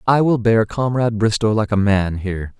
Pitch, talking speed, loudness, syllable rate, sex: 110 Hz, 210 wpm, -18 LUFS, 5.4 syllables/s, male